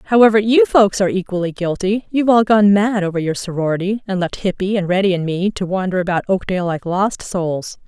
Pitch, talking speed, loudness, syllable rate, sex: 195 Hz, 205 wpm, -17 LUFS, 5.9 syllables/s, female